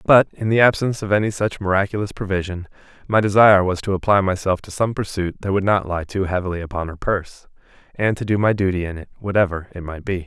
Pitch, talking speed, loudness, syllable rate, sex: 95 Hz, 220 wpm, -20 LUFS, 6.4 syllables/s, male